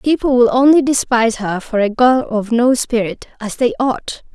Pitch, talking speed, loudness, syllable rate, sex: 240 Hz, 180 wpm, -15 LUFS, 4.7 syllables/s, female